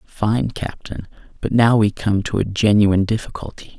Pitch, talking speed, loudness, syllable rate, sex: 105 Hz, 160 wpm, -18 LUFS, 4.8 syllables/s, male